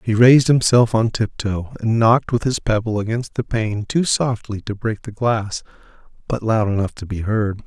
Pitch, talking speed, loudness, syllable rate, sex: 110 Hz, 195 wpm, -19 LUFS, 4.8 syllables/s, male